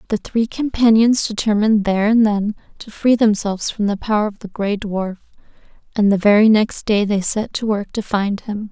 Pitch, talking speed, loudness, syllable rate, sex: 210 Hz, 200 wpm, -17 LUFS, 5.2 syllables/s, female